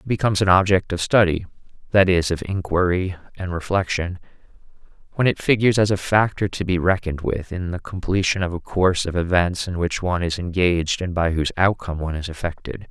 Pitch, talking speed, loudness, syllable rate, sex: 90 Hz, 185 wpm, -21 LUFS, 6.1 syllables/s, male